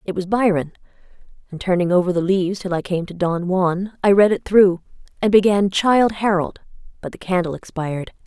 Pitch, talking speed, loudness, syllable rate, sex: 185 Hz, 190 wpm, -19 LUFS, 5.7 syllables/s, female